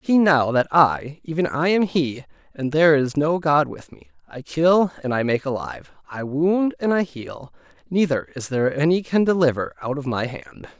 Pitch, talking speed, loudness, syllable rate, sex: 150 Hz, 200 wpm, -21 LUFS, 5.0 syllables/s, male